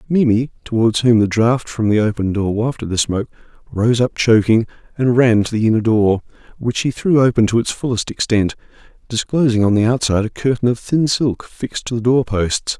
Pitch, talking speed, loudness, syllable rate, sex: 115 Hz, 195 wpm, -17 LUFS, 5.4 syllables/s, male